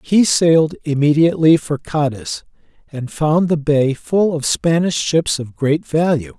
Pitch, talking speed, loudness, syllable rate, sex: 155 Hz, 150 wpm, -16 LUFS, 4.2 syllables/s, male